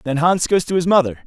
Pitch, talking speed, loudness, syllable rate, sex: 165 Hz, 285 wpm, -17 LUFS, 6.4 syllables/s, male